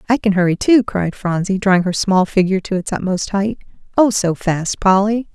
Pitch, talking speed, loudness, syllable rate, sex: 195 Hz, 200 wpm, -16 LUFS, 5.3 syllables/s, female